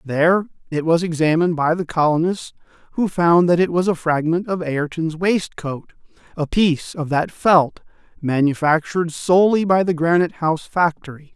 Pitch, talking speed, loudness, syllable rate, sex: 165 Hz, 155 wpm, -19 LUFS, 5.2 syllables/s, male